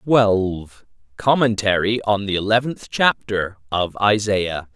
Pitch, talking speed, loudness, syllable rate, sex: 105 Hz, 100 wpm, -19 LUFS, 3.8 syllables/s, male